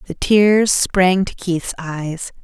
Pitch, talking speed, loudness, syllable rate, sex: 180 Hz, 150 wpm, -17 LUFS, 2.8 syllables/s, female